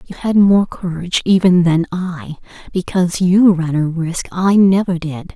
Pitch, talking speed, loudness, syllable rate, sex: 180 Hz, 170 wpm, -15 LUFS, 4.4 syllables/s, female